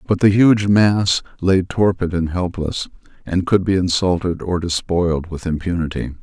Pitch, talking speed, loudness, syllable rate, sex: 90 Hz, 155 wpm, -18 LUFS, 4.6 syllables/s, male